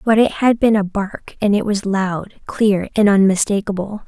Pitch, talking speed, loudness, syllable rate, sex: 205 Hz, 190 wpm, -17 LUFS, 4.5 syllables/s, female